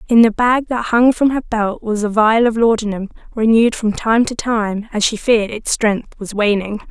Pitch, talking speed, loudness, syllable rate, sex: 220 Hz, 215 wpm, -16 LUFS, 4.9 syllables/s, female